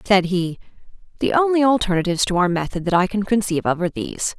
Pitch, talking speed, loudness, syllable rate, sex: 195 Hz, 205 wpm, -20 LUFS, 6.8 syllables/s, female